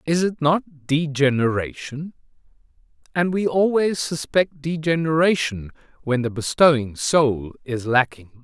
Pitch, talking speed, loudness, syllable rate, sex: 145 Hz, 100 wpm, -21 LUFS, 4.1 syllables/s, male